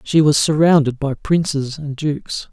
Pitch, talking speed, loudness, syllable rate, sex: 150 Hz, 165 wpm, -17 LUFS, 4.6 syllables/s, male